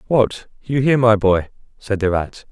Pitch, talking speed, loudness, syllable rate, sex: 110 Hz, 190 wpm, -18 LUFS, 4.7 syllables/s, male